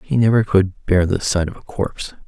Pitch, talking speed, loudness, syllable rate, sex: 100 Hz, 240 wpm, -18 LUFS, 5.3 syllables/s, male